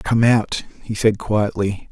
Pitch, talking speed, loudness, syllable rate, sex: 105 Hz, 155 wpm, -19 LUFS, 3.6 syllables/s, male